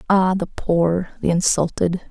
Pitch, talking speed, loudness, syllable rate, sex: 180 Hz, 145 wpm, -20 LUFS, 3.9 syllables/s, female